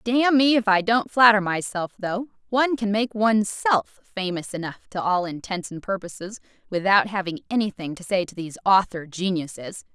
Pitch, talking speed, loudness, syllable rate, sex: 200 Hz, 175 wpm, -23 LUFS, 5.1 syllables/s, female